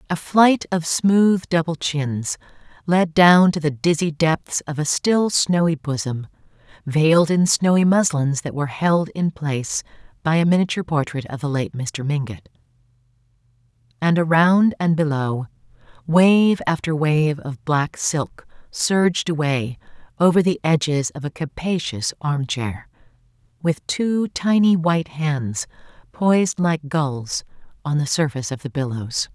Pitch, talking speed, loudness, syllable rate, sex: 155 Hz, 140 wpm, -20 LUFS, 4.2 syllables/s, female